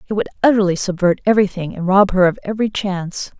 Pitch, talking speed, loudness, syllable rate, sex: 190 Hz, 195 wpm, -17 LUFS, 6.9 syllables/s, female